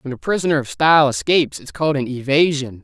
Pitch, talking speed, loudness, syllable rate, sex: 145 Hz, 210 wpm, -17 LUFS, 6.5 syllables/s, male